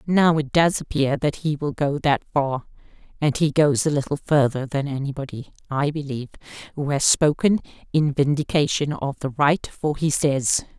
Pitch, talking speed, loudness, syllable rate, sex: 145 Hz, 170 wpm, -22 LUFS, 4.8 syllables/s, female